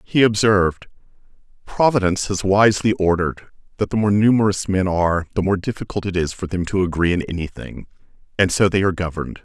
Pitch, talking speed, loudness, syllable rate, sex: 95 Hz, 185 wpm, -19 LUFS, 6.3 syllables/s, male